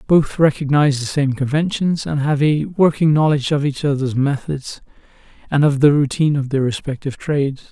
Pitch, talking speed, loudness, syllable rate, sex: 145 Hz, 170 wpm, -17 LUFS, 5.6 syllables/s, male